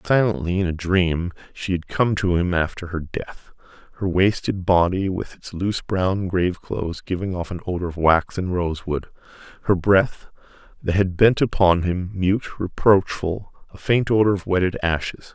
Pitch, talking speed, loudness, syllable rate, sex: 90 Hz, 170 wpm, -21 LUFS, 4.8 syllables/s, male